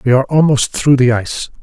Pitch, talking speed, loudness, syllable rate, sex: 130 Hz, 220 wpm, -13 LUFS, 6.3 syllables/s, male